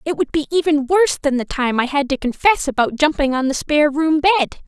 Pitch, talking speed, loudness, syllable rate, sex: 295 Hz, 245 wpm, -17 LUFS, 6.3 syllables/s, female